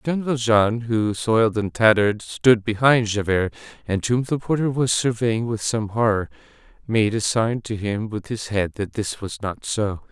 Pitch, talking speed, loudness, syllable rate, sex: 110 Hz, 185 wpm, -21 LUFS, 4.4 syllables/s, male